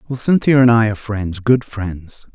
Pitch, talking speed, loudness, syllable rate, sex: 110 Hz, 180 wpm, -16 LUFS, 4.7 syllables/s, male